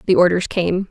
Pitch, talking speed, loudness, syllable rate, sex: 180 Hz, 200 wpm, -17 LUFS, 5.3 syllables/s, female